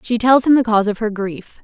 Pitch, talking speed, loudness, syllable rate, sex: 225 Hz, 295 wpm, -16 LUFS, 5.9 syllables/s, female